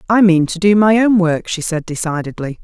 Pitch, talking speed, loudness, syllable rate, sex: 180 Hz, 230 wpm, -14 LUFS, 5.3 syllables/s, female